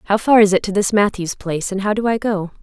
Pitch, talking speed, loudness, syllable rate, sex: 200 Hz, 300 wpm, -17 LUFS, 6.0 syllables/s, female